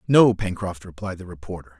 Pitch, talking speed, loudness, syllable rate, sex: 95 Hz, 165 wpm, -23 LUFS, 5.5 syllables/s, male